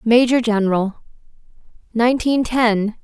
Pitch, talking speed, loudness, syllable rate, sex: 230 Hz, 80 wpm, -17 LUFS, 4.7 syllables/s, female